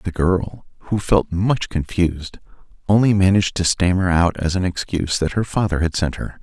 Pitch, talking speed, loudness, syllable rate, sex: 90 Hz, 185 wpm, -19 LUFS, 5.2 syllables/s, male